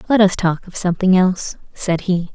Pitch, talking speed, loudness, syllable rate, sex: 185 Hz, 205 wpm, -17 LUFS, 5.5 syllables/s, female